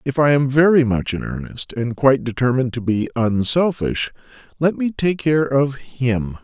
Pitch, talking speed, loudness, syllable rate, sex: 135 Hz, 175 wpm, -19 LUFS, 4.7 syllables/s, male